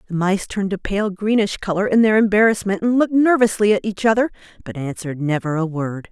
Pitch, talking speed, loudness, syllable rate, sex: 200 Hz, 205 wpm, -18 LUFS, 6.1 syllables/s, female